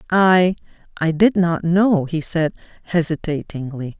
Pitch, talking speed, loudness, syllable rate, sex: 170 Hz, 105 wpm, -18 LUFS, 4.0 syllables/s, female